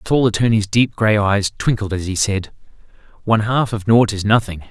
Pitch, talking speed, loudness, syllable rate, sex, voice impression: 105 Hz, 205 wpm, -17 LUFS, 5.5 syllables/s, male, masculine, slightly adult-like, slightly middle-aged, slightly thick, slightly tensed, slightly powerful, slightly dark, hard, slightly muffled, fluent, slightly cool, very intellectual, slightly refreshing, sincere, slightly calm, mature, slightly friendly, slightly reassuring, unique, slightly wild, slightly sweet, strict, intense